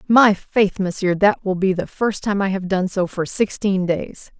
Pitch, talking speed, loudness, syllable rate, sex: 195 Hz, 220 wpm, -19 LUFS, 4.3 syllables/s, female